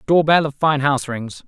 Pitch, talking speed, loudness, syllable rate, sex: 140 Hz, 245 wpm, -18 LUFS, 5.3 syllables/s, male